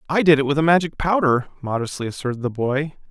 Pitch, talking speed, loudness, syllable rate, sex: 145 Hz, 215 wpm, -20 LUFS, 6.4 syllables/s, male